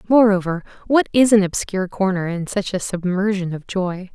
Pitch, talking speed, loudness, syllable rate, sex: 195 Hz, 175 wpm, -19 LUFS, 5.2 syllables/s, female